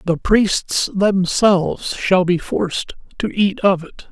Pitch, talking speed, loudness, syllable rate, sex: 185 Hz, 145 wpm, -17 LUFS, 3.5 syllables/s, male